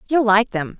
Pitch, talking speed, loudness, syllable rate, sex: 225 Hz, 225 wpm, -17 LUFS, 4.9 syllables/s, female